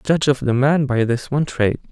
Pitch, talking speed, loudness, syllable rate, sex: 135 Hz, 250 wpm, -18 LUFS, 5.9 syllables/s, male